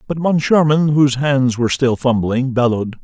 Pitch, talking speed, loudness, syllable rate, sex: 135 Hz, 160 wpm, -15 LUFS, 5.3 syllables/s, male